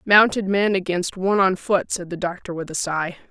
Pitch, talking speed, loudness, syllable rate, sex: 185 Hz, 220 wpm, -21 LUFS, 5.2 syllables/s, female